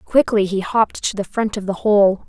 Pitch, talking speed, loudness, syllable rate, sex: 205 Hz, 235 wpm, -18 LUFS, 5.1 syllables/s, female